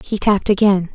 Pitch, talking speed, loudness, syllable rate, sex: 200 Hz, 190 wpm, -16 LUFS, 6.1 syllables/s, female